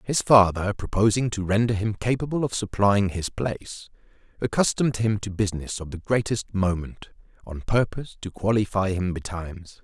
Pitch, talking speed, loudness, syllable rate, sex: 105 Hz, 155 wpm, -24 LUFS, 5.3 syllables/s, male